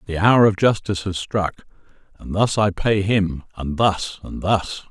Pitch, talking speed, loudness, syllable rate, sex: 95 Hz, 160 wpm, -20 LUFS, 4.4 syllables/s, male